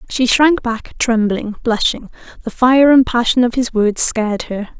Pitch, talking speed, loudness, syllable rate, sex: 235 Hz, 175 wpm, -14 LUFS, 4.5 syllables/s, female